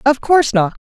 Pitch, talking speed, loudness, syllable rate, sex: 260 Hz, 220 wpm, -14 LUFS, 5.8 syllables/s, female